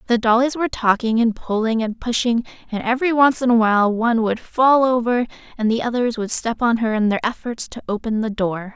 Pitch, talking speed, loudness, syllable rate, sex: 230 Hz, 220 wpm, -19 LUFS, 5.7 syllables/s, female